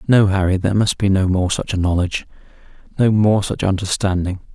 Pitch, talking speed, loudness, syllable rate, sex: 95 Hz, 160 wpm, -18 LUFS, 5.6 syllables/s, male